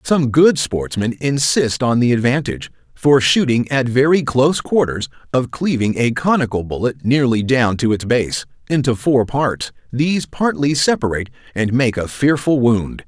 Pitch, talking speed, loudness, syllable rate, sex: 130 Hz, 155 wpm, -17 LUFS, 4.6 syllables/s, male